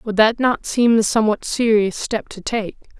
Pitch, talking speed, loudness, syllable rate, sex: 220 Hz, 200 wpm, -18 LUFS, 4.7 syllables/s, female